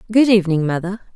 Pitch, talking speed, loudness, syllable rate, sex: 195 Hz, 155 wpm, -16 LUFS, 7.7 syllables/s, female